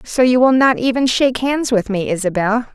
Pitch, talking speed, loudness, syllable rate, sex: 240 Hz, 220 wpm, -15 LUFS, 5.4 syllables/s, female